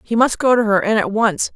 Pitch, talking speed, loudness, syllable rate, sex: 215 Hz, 310 wpm, -16 LUFS, 5.5 syllables/s, female